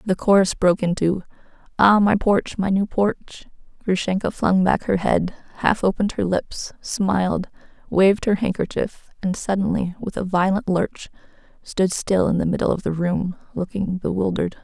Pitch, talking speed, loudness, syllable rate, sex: 190 Hz, 160 wpm, -21 LUFS, 4.9 syllables/s, female